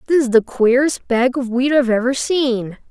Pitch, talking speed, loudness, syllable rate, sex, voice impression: 255 Hz, 205 wpm, -17 LUFS, 4.9 syllables/s, female, very feminine, very young, very thin, tensed, slightly powerful, very bright, hard, clear, fluent, very cute, intellectual, refreshing, slightly sincere, calm, friendly, reassuring, very unique, slightly elegant, sweet, lively, kind, slightly intense, slightly sharp, very light